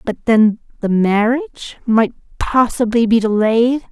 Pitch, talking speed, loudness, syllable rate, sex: 230 Hz, 125 wpm, -15 LUFS, 4.2 syllables/s, female